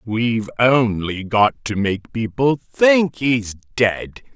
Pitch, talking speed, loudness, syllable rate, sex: 115 Hz, 125 wpm, -18 LUFS, 3.2 syllables/s, male